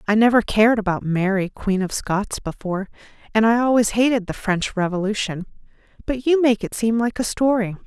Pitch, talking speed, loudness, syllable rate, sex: 215 Hz, 185 wpm, -20 LUFS, 5.5 syllables/s, female